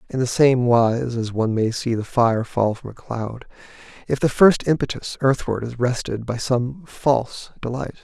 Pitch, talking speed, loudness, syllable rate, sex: 120 Hz, 185 wpm, -21 LUFS, 3.7 syllables/s, male